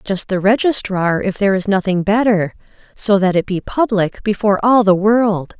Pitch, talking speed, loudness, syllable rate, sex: 200 Hz, 170 wpm, -15 LUFS, 4.9 syllables/s, female